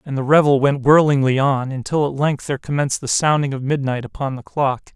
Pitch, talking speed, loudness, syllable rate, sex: 140 Hz, 220 wpm, -18 LUFS, 5.9 syllables/s, male